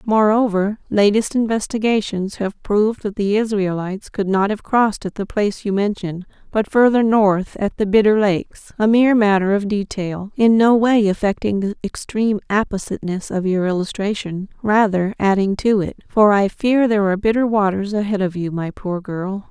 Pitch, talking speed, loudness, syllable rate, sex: 205 Hz, 170 wpm, -18 LUFS, 5.1 syllables/s, female